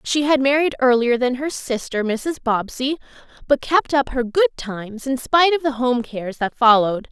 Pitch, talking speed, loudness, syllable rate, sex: 260 Hz, 195 wpm, -19 LUFS, 5.1 syllables/s, female